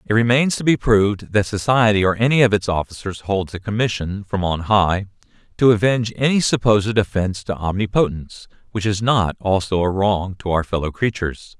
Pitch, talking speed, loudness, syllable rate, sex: 100 Hz, 180 wpm, -19 LUFS, 5.6 syllables/s, male